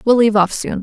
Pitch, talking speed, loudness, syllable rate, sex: 215 Hz, 290 wpm, -14 LUFS, 6.9 syllables/s, female